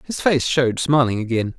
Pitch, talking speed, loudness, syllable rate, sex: 130 Hz, 190 wpm, -19 LUFS, 5.4 syllables/s, male